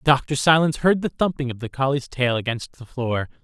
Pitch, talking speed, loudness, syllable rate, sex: 135 Hz, 210 wpm, -22 LUFS, 5.3 syllables/s, male